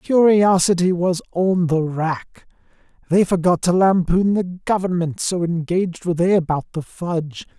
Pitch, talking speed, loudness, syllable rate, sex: 175 Hz, 140 wpm, -19 LUFS, 4.5 syllables/s, male